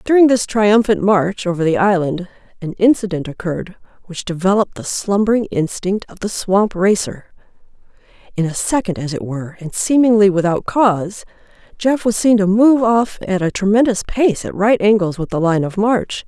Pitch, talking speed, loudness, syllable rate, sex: 200 Hz, 175 wpm, -16 LUFS, 5.1 syllables/s, female